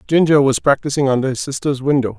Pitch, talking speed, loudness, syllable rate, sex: 135 Hz, 195 wpm, -16 LUFS, 6.3 syllables/s, male